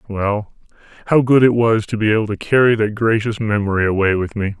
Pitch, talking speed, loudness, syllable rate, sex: 110 Hz, 210 wpm, -16 LUFS, 5.7 syllables/s, male